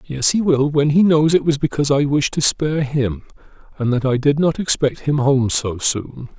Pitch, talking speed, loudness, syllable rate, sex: 140 Hz, 225 wpm, -17 LUFS, 5.0 syllables/s, male